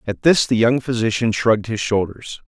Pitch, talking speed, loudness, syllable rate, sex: 115 Hz, 190 wpm, -18 LUFS, 5.2 syllables/s, male